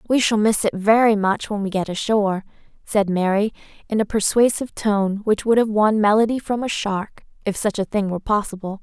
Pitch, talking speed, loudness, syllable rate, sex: 210 Hz, 205 wpm, -20 LUFS, 5.5 syllables/s, female